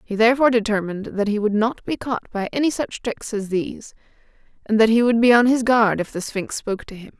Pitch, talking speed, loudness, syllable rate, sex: 220 Hz, 240 wpm, -20 LUFS, 6.1 syllables/s, female